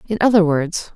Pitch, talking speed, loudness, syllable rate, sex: 185 Hz, 190 wpm, -17 LUFS, 5.3 syllables/s, female